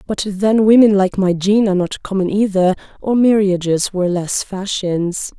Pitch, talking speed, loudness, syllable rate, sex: 195 Hz, 165 wpm, -16 LUFS, 4.7 syllables/s, female